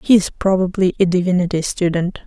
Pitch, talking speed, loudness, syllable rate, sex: 185 Hz, 130 wpm, -17 LUFS, 5.2 syllables/s, female